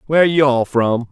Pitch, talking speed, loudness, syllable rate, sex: 135 Hz, 215 wpm, -15 LUFS, 5.3 syllables/s, male